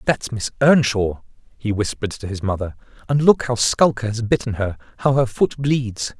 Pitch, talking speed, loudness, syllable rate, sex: 115 Hz, 175 wpm, -20 LUFS, 5.0 syllables/s, male